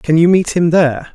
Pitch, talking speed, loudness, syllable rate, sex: 165 Hz, 260 wpm, -13 LUFS, 5.4 syllables/s, male